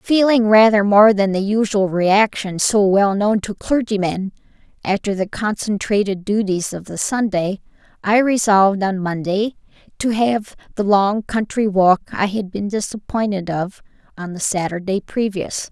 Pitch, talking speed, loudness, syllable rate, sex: 205 Hz, 140 wpm, -18 LUFS, 4.4 syllables/s, female